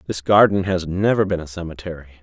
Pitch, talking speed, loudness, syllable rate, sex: 90 Hz, 190 wpm, -19 LUFS, 6.2 syllables/s, male